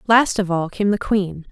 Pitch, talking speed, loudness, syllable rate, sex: 195 Hz, 235 wpm, -19 LUFS, 4.4 syllables/s, female